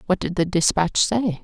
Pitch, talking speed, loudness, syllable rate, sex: 180 Hz, 210 wpm, -20 LUFS, 4.7 syllables/s, female